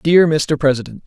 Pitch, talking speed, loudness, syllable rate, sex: 155 Hz, 170 wpm, -16 LUFS, 4.9 syllables/s, male